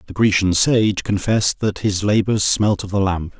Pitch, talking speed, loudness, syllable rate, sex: 100 Hz, 195 wpm, -18 LUFS, 4.7 syllables/s, male